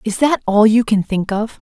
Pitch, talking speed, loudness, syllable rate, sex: 215 Hz, 240 wpm, -15 LUFS, 4.8 syllables/s, female